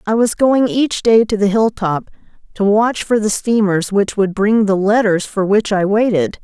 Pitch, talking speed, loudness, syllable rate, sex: 210 Hz, 215 wpm, -15 LUFS, 4.5 syllables/s, female